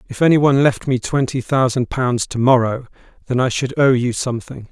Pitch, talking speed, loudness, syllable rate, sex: 125 Hz, 190 wpm, -17 LUFS, 5.4 syllables/s, male